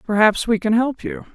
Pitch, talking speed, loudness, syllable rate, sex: 230 Hz, 225 wpm, -18 LUFS, 5.2 syllables/s, female